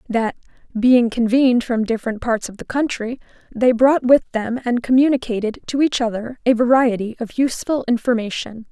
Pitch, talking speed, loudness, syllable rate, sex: 240 Hz, 160 wpm, -18 LUFS, 5.3 syllables/s, female